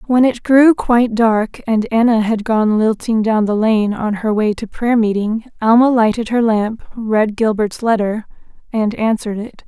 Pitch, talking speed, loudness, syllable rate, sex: 220 Hz, 175 wpm, -15 LUFS, 4.4 syllables/s, female